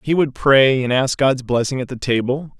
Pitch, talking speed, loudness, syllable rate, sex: 130 Hz, 230 wpm, -17 LUFS, 4.8 syllables/s, male